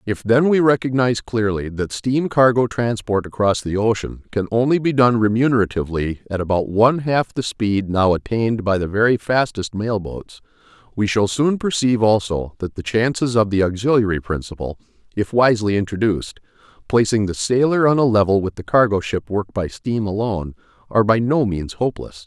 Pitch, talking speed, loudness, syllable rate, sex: 110 Hz, 175 wpm, -19 LUFS, 5.5 syllables/s, male